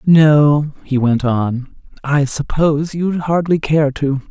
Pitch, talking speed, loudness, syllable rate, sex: 145 Hz, 140 wpm, -15 LUFS, 3.4 syllables/s, male